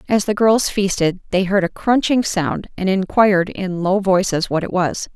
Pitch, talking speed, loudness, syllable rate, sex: 190 Hz, 200 wpm, -18 LUFS, 4.6 syllables/s, female